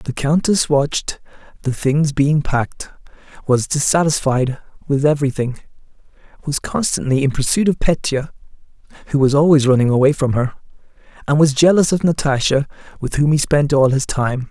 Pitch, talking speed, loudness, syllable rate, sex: 140 Hz, 150 wpm, -17 LUFS, 5.2 syllables/s, male